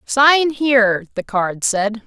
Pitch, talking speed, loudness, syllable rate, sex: 235 Hz, 145 wpm, -16 LUFS, 3.3 syllables/s, female